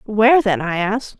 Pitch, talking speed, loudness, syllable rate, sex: 220 Hz, 200 wpm, -16 LUFS, 5.7 syllables/s, female